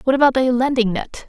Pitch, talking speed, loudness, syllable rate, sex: 250 Hz, 235 wpm, -18 LUFS, 6.1 syllables/s, female